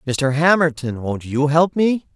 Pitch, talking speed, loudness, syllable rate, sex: 150 Hz, 165 wpm, -18 LUFS, 4.1 syllables/s, male